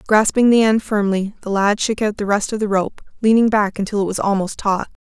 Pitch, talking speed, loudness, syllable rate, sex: 205 Hz, 240 wpm, -18 LUFS, 5.5 syllables/s, female